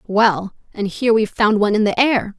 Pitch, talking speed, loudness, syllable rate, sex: 215 Hz, 225 wpm, -17 LUFS, 5.6 syllables/s, female